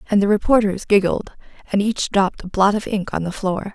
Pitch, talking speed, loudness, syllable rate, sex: 200 Hz, 225 wpm, -19 LUFS, 5.6 syllables/s, female